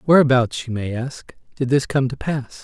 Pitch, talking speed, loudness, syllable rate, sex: 130 Hz, 205 wpm, -20 LUFS, 4.6 syllables/s, male